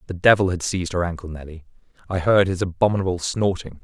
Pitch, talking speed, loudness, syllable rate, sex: 90 Hz, 190 wpm, -21 LUFS, 6.5 syllables/s, male